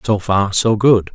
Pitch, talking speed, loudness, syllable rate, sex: 105 Hz, 210 wpm, -15 LUFS, 4.0 syllables/s, male